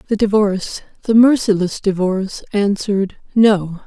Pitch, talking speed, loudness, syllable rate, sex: 200 Hz, 95 wpm, -16 LUFS, 4.8 syllables/s, female